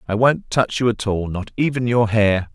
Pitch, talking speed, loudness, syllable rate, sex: 110 Hz, 210 wpm, -19 LUFS, 4.7 syllables/s, male